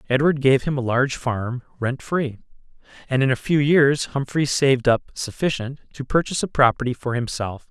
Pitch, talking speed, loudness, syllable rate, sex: 135 Hz, 180 wpm, -21 LUFS, 5.2 syllables/s, male